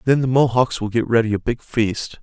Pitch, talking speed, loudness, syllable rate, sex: 120 Hz, 245 wpm, -19 LUFS, 5.3 syllables/s, male